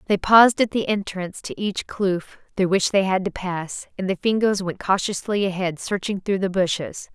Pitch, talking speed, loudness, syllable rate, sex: 190 Hz, 200 wpm, -22 LUFS, 4.9 syllables/s, female